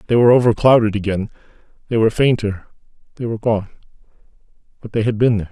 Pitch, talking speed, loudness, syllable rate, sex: 110 Hz, 165 wpm, -17 LUFS, 7.7 syllables/s, male